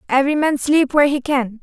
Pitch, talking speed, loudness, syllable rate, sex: 280 Hz, 220 wpm, -17 LUFS, 6.2 syllables/s, female